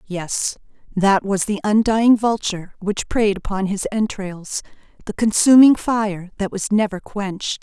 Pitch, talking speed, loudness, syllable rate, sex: 205 Hz, 135 wpm, -19 LUFS, 4.1 syllables/s, female